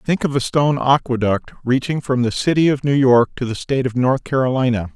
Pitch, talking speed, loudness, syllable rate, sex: 130 Hz, 220 wpm, -18 LUFS, 5.8 syllables/s, male